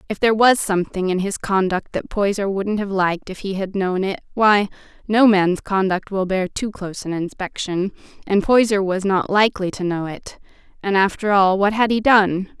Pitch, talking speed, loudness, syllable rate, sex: 195 Hz, 200 wpm, -19 LUFS, 5.0 syllables/s, female